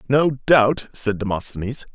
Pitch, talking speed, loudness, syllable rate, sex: 120 Hz, 125 wpm, -20 LUFS, 4.2 syllables/s, male